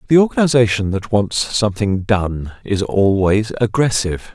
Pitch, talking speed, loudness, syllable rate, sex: 105 Hz, 125 wpm, -17 LUFS, 4.8 syllables/s, male